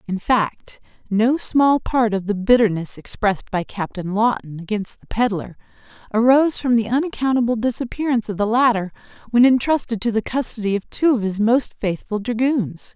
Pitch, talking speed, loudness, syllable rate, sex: 225 Hz, 160 wpm, -20 LUFS, 5.2 syllables/s, female